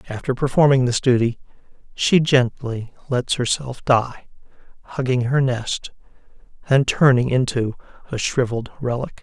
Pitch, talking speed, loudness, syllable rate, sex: 125 Hz, 115 wpm, -20 LUFS, 4.6 syllables/s, male